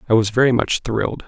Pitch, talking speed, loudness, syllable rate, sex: 115 Hz, 235 wpm, -18 LUFS, 6.4 syllables/s, male